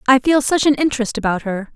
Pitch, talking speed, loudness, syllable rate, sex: 250 Hz, 240 wpm, -17 LUFS, 6.3 syllables/s, female